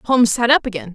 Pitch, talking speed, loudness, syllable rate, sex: 230 Hz, 255 wpm, -15 LUFS, 6.6 syllables/s, female